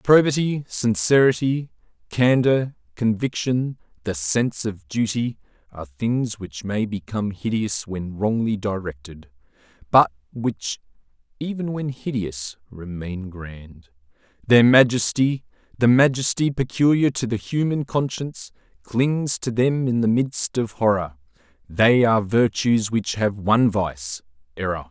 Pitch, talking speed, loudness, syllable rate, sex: 110 Hz, 115 wpm, -21 LUFS, 4.1 syllables/s, male